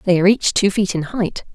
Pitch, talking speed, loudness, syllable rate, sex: 190 Hz, 275 wpm, -17 LUFS, 5.9 syllables/s, female